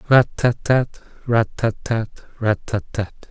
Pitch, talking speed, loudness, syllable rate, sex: 115 Hz, 110 wpm, -21 LUFS, 3.4 syllables/s, male